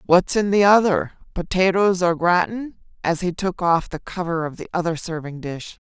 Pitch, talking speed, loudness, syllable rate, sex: 180 Hz, 185 wpm, -20 LUFS, 4.8 syllables/s, female